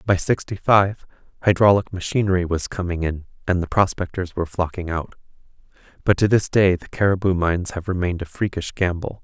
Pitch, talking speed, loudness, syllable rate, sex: 90 Hz, 170 wpm, -21 LUFS, 5.8 syllables/s, male